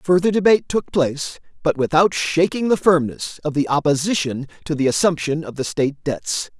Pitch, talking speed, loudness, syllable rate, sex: 160 Hz, 175 wpm, -19 LUFS, 5.4 syllables/s, male